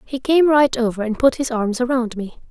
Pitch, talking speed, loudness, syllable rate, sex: 245 Hz, 240 wpm, -18 LUFS, 5.2 syllables/s, female